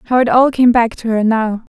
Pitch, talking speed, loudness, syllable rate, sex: 235 Hz, 275 wpm, -13 LUFS, 5.4 syllables/s, female